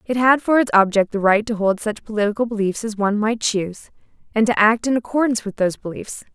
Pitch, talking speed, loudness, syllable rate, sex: 215 Hz, 225 wpm, -19 LUFS, 6.3 syllables/s, female